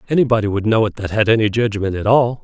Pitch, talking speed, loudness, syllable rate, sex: 110 Hz, 245 wpm, -17 LUFS, 6.7 syllables/s, male